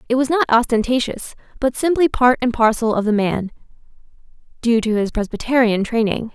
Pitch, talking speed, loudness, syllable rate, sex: 235 Hz, 160 wpm, -18 LUFS, 5.5 syllables/s, female